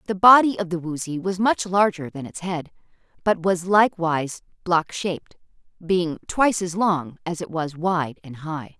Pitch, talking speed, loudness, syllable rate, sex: 175 Hz, 170 wpm, -22 LUFS, 4.7 syllables/s, female